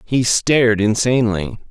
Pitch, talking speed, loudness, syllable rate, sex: 115 Hz, 105 wpm, -16 LUFS, 4.6 syllables/s, male